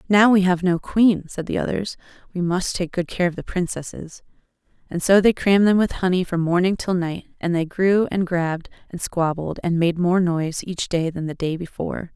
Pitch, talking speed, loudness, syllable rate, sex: 180 Hz, 215 wpm, -21 LUFS, 5.2 syllables/s, female